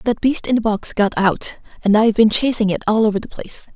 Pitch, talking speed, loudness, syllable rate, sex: 215 Hz, 255 wpm, -17 LUFS, 5.9 syllables/s, female